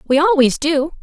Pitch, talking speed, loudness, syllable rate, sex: 305 Hz, 175 wpm, -15 LUFS, 5.2 syllables/s, female